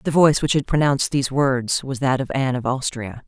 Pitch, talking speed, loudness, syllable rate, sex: 135 Hz, 240 wpm, -20 LUFS, 6.0 syllables/s, female